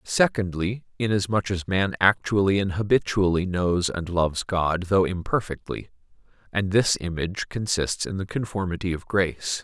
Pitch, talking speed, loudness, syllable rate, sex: 95 Hz, 135 wpm, -24 LUFS, 4.9 syllables/s, male